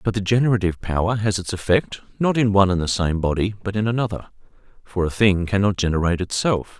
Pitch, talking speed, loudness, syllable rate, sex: 100 Hz, 205 wpm, -21 LUFS, 6.4 syllables/s, male